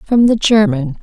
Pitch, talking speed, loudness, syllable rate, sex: 205 Hz, 175 wpm, -12 LUFS, 4.8 syllables/s, female